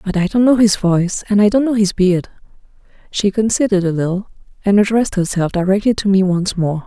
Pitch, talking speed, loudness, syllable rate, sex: 195 Hz, 210 wpm, -15 LUFS, 6.1 syllables/s, female